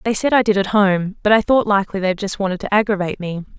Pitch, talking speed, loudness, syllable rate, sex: 200 Hz, 270 wpm, -17 LUFS, 6.7 syllables/s, female